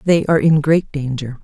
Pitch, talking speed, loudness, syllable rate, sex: 150 Hz, 210 wpm, -16 LUFS, 5.4 syllables/s, female